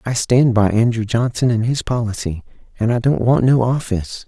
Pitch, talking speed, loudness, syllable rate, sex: 115 Hz, 195 wpm, -17 LUFS, 5.3 syllables/s, male